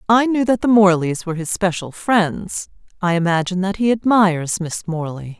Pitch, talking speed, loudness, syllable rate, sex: 190 Hz, 180 wpm, -18 LUFS, 5.1 syllables/s, female